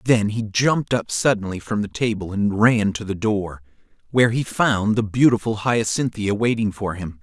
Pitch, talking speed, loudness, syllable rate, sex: 110 Hz, 185 wpm, -21 LUFS, 4.8 syllables/s, male